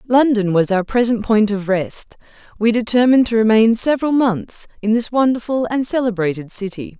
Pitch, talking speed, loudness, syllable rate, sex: 225 Hz, 165 wpm, -17 LUFS, 5.2 syllables/s, female